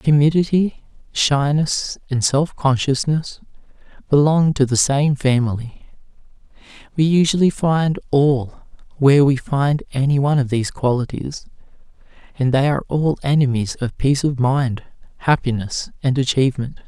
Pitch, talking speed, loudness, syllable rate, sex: 140 Hz, 120 wpm, -18 LUFS, 4.7 syllables/s, male